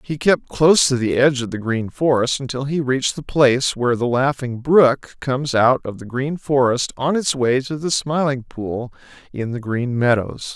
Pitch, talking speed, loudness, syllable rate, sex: 130 Hz, 205 wpm, -19 LUFS, 4.8 syllables/s, male